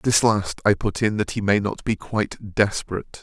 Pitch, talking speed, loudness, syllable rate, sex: 105 Hz, 225 wpm, -22 LUFS, 5.1 syllables/s, male